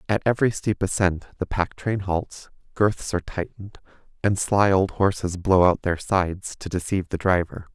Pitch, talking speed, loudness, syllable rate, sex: 95 Hz, 180 wpm, -23 LUFS, 5.1 syllables/s, male